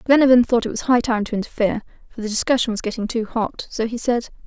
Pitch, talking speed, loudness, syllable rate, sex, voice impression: 230 Hz, 240 wpm, -20 LUFS, 6.6 syllables/s, female, very feminine, young, slightly adult-like, very thin, slightly relaxed, weak, slightly dark, soft, very clear, very fluent, very cute, intellectual, refreshing, sincere, very calm, very friendly, very reassuring, unique, elegant, very sweet, slightly lively, very kind, slightly intense, slightly sharp, modest, light